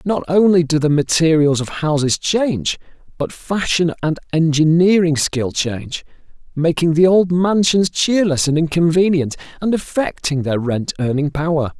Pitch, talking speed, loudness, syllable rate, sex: 160 Hz, 135 wpm, -16 LUFS, 4.6 syllables/s, male